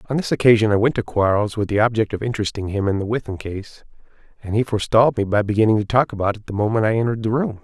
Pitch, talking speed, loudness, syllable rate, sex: 110 Hz, 260 wpm, -19 LUFS, 7.3 syllables/s, male